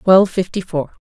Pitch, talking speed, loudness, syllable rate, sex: 185 Hz, 175 wpm, -17 LUFS, 5.4 syllables/s, female